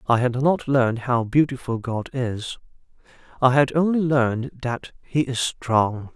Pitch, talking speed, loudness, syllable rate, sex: 130 Hz, 155 wpm, -22 LUFS, 4.3 syllables/s, male